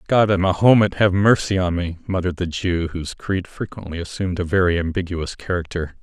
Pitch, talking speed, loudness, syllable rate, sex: 90 Hz, 180 wpm, -20 LUFS, 5.8 syllables/s, male